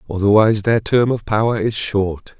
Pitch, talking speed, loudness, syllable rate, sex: 105 Hz, 175 wpm, -17 LUFS, 5.0 syllables/s, male